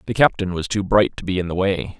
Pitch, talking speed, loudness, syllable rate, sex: 95 Hz, 300 wpm, -20 LUFS, 6.0 syllables/s, male